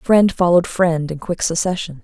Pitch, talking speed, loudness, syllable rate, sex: 175 Hz, 175 wpm, -17 LUFS, 5.0 syllables/s, female